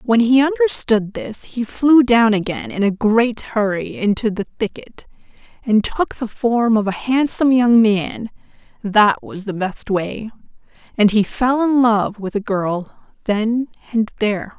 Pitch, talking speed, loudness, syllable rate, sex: 220 Hz, 155 wpm, -17 LUFS, 4.1 syllables/s, female